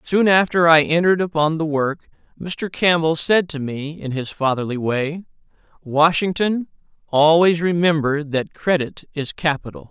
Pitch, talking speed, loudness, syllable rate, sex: 160 Hz, 140 wpm, -19 LUFS, 4.5 syllables/s, male